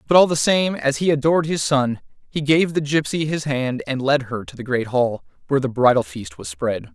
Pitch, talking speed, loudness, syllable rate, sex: 140 Hz, 240 wpm, -20 LUFS, 5.3 syllables/s, male